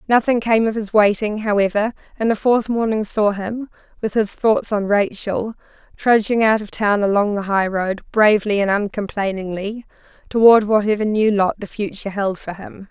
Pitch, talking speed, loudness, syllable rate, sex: 210 Hz, 165 wpm, -18 LUFS, 5.0 syllables/s, female